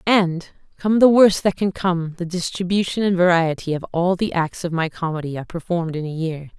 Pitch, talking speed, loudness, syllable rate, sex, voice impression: 175 Hz, 210 wpm, -20 LUFS, 5.4 syllables/s, female, very feminine, very adult-like, thin, tensed, powerful, bright, hard, clear, very fluent, cool, very intellectual, refreshing, sincere, very calm, very friendly, very reassuring, unique, very elegant, wild, sweet, slightly lively, kind, slightly sharp, slightly modest